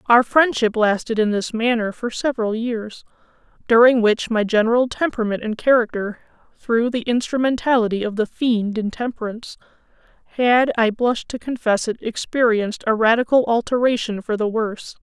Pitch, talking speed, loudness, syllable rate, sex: 230 Hz, 135 wpm, -19 LUFS, 5.0 syllables/s, female